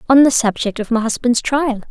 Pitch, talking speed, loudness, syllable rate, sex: 245 Hz, 220 wpm, -16 LUFS, 5.4 syllables/s, female